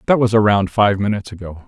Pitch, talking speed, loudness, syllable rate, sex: 105 Hz, 215 wpm, -16 LUFS, 6.6 syllables/s, male